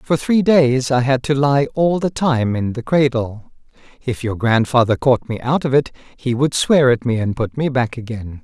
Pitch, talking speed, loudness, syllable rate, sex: 130 Hz, 220 wpm, -17 LUFS, 4.6 syllables/s, male